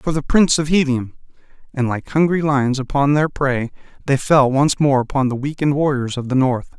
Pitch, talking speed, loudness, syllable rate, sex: 140 Hz, 205 wpm, -18 LUFS, 5.3 syllables/s, male